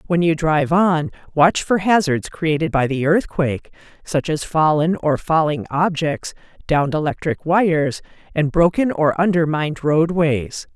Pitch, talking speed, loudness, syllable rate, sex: 160 Hz, 140 wpm, -18 LUFS, 4.5 syllables/s, female